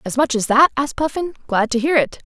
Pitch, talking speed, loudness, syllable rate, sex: 265 Hz, 260 wpm, -18 LUFS, 6.2 syllables/s, female